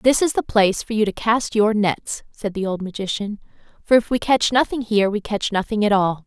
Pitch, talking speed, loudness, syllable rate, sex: 210 Hz, 240 wpm, -20 LUFS, 5.4 syllables/s, female